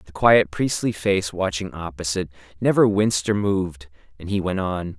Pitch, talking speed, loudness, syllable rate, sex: 95 Hz, 170 wpm, -22 LUFS, 5.0 syllables/s, male